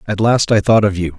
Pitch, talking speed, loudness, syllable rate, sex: 100 Hz, 305 wpm, -14 LUFS, 5.7 syllables/s, male